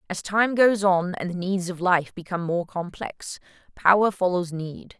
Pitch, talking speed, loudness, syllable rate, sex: 185 Hz, 180 wpm, -23 LUFS, 4.5 syllables/s, female